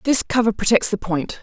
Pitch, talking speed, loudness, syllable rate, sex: 210 Hz, 210 wpm, -19 LUFS, 5.3 syllables/s, female